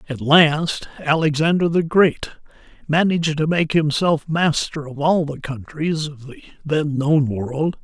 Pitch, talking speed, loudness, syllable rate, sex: 155 Hz, 145 wpm, -19 LUFS, 4.1 syllables/s, male